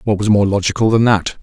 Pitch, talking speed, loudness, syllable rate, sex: 105 Hz, 250 wpm, -14 LUFS, 6.1 syllables/s, male